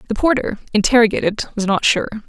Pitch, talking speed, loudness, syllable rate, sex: 220 Hz, 160 wpm, -17 LUFS, 6.7 syllables/s, female